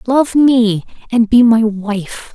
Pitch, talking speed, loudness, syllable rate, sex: 230 Hz, 155 wpm, -13 LUFS, 3.0 syllables/s, female